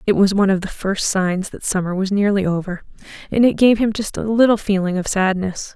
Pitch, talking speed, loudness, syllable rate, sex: 195 Hz, 230 wpm, -18 LUFS, 5.7 syllables/s, female